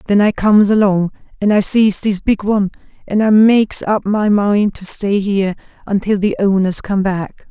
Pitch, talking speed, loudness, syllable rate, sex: 200 Hz, 190 wpm, -15 LUFS, 4.9 syllables/s, female